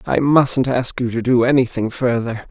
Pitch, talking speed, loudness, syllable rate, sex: 120 Hz, 190 wpm, -17 LUFS, 4.6 syllables/s, male